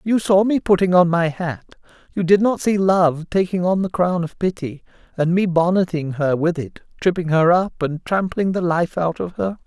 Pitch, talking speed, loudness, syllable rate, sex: 175 Hz, 210 wpm, -19 LUFS, 4.8 syllables/s, male